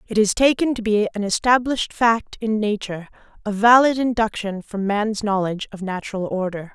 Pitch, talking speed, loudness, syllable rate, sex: 215 Hz, 170 wpm, -20 LUFS, 5.4 syllables/s, female